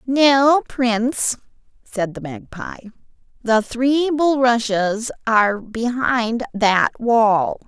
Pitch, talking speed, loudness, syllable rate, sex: 235 Hz, 95 wpm, -18 LUFS, 2.9 syllables/s, female